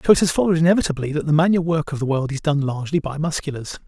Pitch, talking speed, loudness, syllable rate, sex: 155 Hz, 265 wpm, -20 LUFS, 7.6 syllables/s, male